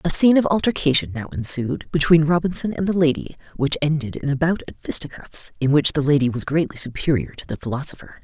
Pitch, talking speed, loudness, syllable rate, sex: 150 Hz, 205 wpm, -20 LUFS, 6.2 syllables/s, female